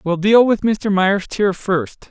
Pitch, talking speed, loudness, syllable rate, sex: 195 Hz, 200 wpm, -16 LUFS, 4.0 syllables/s, male